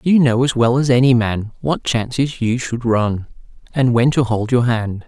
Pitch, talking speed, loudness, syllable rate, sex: 120 Hz, 215 wpm, -17 LUFS, 4.5 syllables/s, male